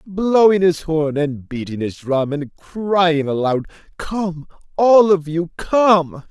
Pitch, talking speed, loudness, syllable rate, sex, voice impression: 165 Hz, 145 wpm, -17 LUFS, 3.3 syllables/s, male, masculine, adult-like, slightly sincere, friendly, kind